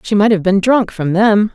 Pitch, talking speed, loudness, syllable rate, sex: 205 Hz, 270 wpm, -13 LUFS, 4.8 syllables/s, female